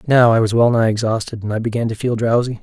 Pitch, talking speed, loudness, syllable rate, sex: 115 Hz, 250 wpm, -17 LUFS, 5.9 syllables/s, male